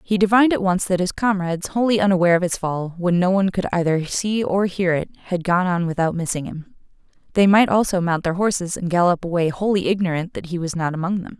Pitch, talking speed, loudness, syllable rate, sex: 180 Hz, 230 wpm, -20 LUFS, 6.2 syllables/s, female